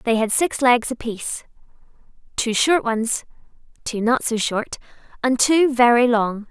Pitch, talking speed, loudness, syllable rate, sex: 240 Hz, 140 wpm, -19 LUFS, 4.2 syllables/s, female